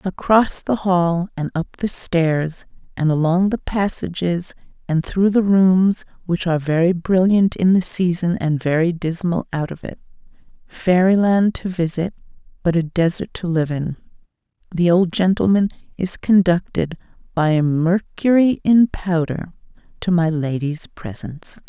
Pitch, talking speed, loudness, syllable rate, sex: 175 Hz, 140 wpm, -19 LUFS, 4.3 syllables/s, female